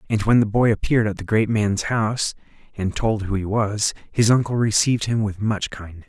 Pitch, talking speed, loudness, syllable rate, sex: 105 Hz, 215 wpm, -21 LUFS, 5.4 syllables/s, male